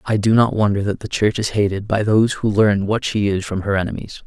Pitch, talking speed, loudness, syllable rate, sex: 105 Hz, 265 wpm, -18 LUFS, 5.8 syllables/s, male